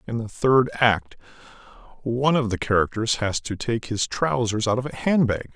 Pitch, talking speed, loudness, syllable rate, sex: 115 Hz, 185 wpm, -23 LUFS, 5.0 syllables/s, male